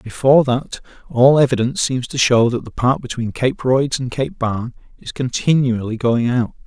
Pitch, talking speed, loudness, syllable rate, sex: 125 Hz, 180 wpm, -17 LUFS, 5.0 syllables/s, male